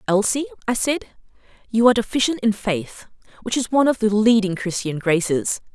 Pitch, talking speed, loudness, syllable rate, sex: 215 Hz, 155 wpm, -20 LUFS, 5.6 syllables/s, female